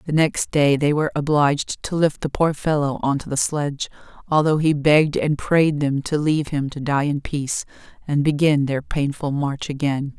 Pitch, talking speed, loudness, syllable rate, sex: 145 Hz, 200 wpm, -20 LUFS, 5.0 syllables/s, female